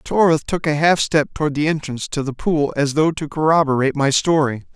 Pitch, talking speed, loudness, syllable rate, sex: 150 Hz, 215 wpm, -18 LUFS, 5.7 syllables/s, male